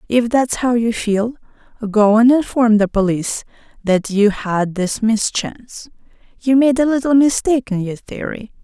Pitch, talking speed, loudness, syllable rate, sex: 230 Hz, 160 wpm, -16 LUFS, 4.6 syllables/s, female